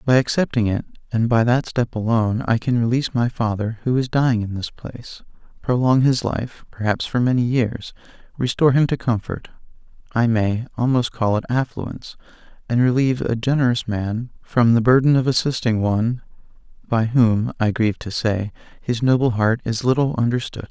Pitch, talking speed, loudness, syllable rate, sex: 120 Hz, 170 wpm, -20 LUFS, 5.3 syllables/s, male